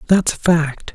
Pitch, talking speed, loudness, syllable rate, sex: 165 Hz, 190 wpm, -17 LUFS, 4.0 syllables/s, male